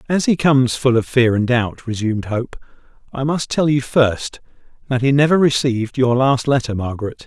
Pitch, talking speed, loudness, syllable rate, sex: 130 Hz, 190 wpm, -17 LUFS, 5.3 syllables/s, male